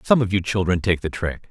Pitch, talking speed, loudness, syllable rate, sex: 95 Hz, 280 wpm, -21 LUFS, 5.7 syllables/s, male